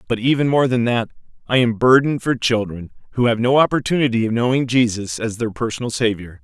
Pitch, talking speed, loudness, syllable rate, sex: 120 Hz, 195 wpm, -18 LUFS, 6.0 syllables/s, male